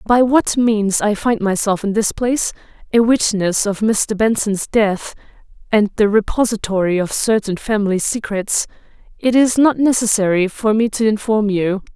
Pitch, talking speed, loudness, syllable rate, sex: 215 Hz, 155 wpm, -16 LUFS, 4.6 syllables/s, female